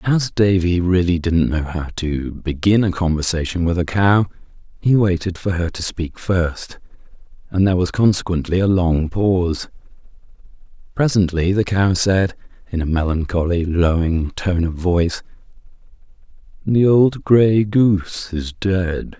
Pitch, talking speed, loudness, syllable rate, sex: 90 Hz, 140 wpm, -18 LUFS, 4.3 syllables/s, male